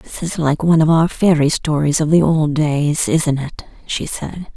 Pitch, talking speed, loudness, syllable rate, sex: 155 Hz, 210 wpm, -16 LUFS, 4.4 syllables/s, female